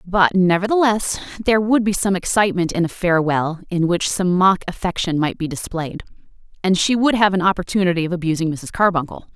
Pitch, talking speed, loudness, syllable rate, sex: 185 Hz, 180 wpm, -18 LUFS, 5.9 syllables/s, female